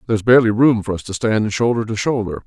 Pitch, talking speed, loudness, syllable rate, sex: 110 Hz, 270 wpm, -17 LUFS, 6.9 syllables/s, male